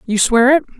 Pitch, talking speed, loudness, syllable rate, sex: 250 Hz, 225 wpm, -13 LUFS, 5.7 syllables/s, female